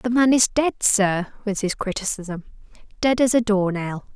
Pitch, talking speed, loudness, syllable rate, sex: 210 Hz, 190 wpm, -21 LUFS, 4.5 syllables/s, female